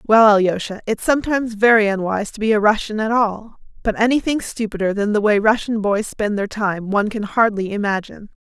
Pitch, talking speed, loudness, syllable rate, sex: 215 Hz, 190 wpm, -18 LUFS, 5.7 syllables/s, female